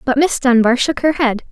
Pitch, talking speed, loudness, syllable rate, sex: 260 Hz, 240 wpm, -15 LUFS, 5.1 syllables/s, female